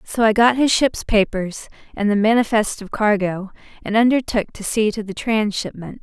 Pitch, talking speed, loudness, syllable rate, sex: 215 Hz, 190 wpm, -19 LUFS, 4.9 syllables/s, female